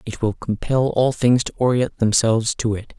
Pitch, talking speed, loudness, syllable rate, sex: 115 Hz, 200 wpm, -19 LUFS, 5.0 syllables/s, male